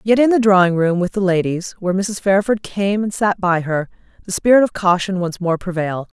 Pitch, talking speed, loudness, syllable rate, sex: 190 Hz, 225 wpm, -17 LUFS, 5.5 syllables/s, female